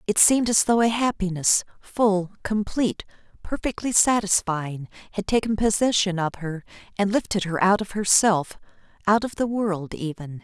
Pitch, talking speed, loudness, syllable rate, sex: 200 Hz, 140 wpm, -22 LUFS, 4.9 syllables/s, female